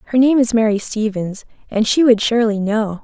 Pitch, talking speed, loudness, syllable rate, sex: 225 Hz, 195 wpm, -16 LUFS, 5.6 syllables/s, female